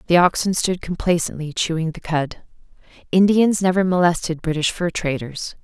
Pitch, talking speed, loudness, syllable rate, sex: 170 Hz, 140 wpm, -20 LUFS, 5.1 syllables/s, female